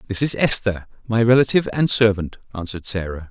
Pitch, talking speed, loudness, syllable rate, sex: 110 Hz, 165 wpm, -19 LUFS, 6.1 syllables/s, male